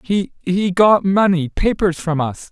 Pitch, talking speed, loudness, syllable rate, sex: 180 Hz, 95 wpm, -17 LUFS, 3.8 syllables/s, male